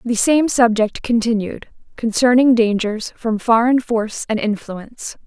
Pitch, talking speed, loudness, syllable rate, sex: 230 Hz, 125 wpm, -17 LUFS, 2.1 syllables/s, female